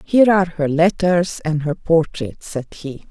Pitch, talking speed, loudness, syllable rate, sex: 165 Hz, 175 wpm, -18 LUFS, 4.4 syllables/s, female